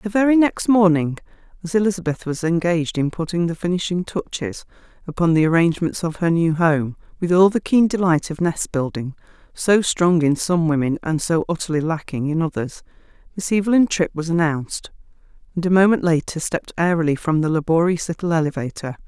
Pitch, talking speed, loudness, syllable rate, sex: 170 Hz, 175 wpm, -19 LUFS, 5.7 syllables/s, female